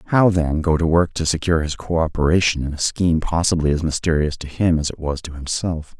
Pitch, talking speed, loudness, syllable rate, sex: 80 Hz, 220 wpm, -20 LUFS, 5.6 syllables/s, male